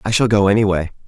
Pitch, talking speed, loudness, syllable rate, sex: 100 Hz, 225 wpm, -16 LUFS, 7.1 syllables/s, male